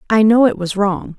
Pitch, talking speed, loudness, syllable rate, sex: 210 Hz, 255 wpm, -15 LUFS, 5.0 syllables/s, female